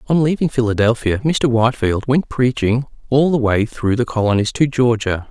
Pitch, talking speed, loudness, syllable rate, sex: 120 Hz, 170 wpm, -17 LUFS, 5.2 syllables/s, male